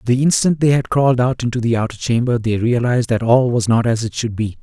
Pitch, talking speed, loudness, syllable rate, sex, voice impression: 120 Hz, 260 wpm, -17 LUFS, 6.1 syllables/s, male, masculine, adult-like, weak, slightly bright, slightly raspy, sincere, calm, slightly mature, friendly, reassuring, wild, kind, modest